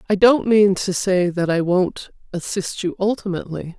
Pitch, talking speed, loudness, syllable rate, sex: 190 Hz, 175 wpm, -19 LUFS, 4.7 syllables/s, female